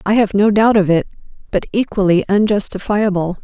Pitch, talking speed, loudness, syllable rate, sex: 200 Hz, 155 wpm, -15 LUFS, 5.4 syllables/s, female